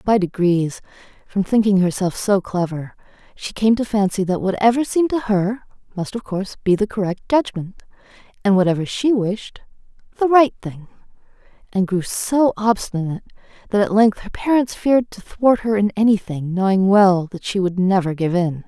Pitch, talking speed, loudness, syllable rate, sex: 200 Hz, 175 wpm, -19 LUFS, 5.1 syllables/s, female